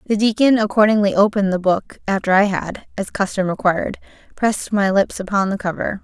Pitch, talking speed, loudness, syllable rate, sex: 200 Hz, 180 wpm, -18 LUFS, 5.8 syllables/s, female